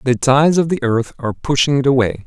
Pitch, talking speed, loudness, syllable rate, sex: 130 Hz, 240 wpm, -16 LUFS, 6.3 syllables/s, male